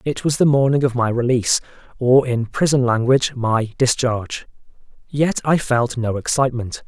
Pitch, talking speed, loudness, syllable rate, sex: 125 Hz, 155 wpm, -18 LUFS, 5.1 syllables/s, male